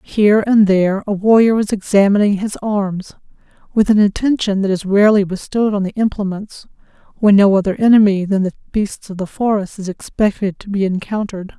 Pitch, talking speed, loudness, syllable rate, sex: 200 Hz, 175 wpm, -15 LUFS, 5.6 syllables/s, female